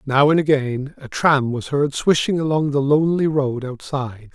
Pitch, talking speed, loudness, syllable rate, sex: 140 Hz, 180 wpm, -19 LUFS, 4.8 syllables/s, male